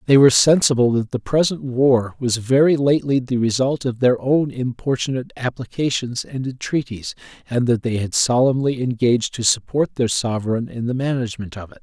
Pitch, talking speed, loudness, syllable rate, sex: 125 Hz, 170 wpm, -19 LUFS, 5.4 syllables/s, male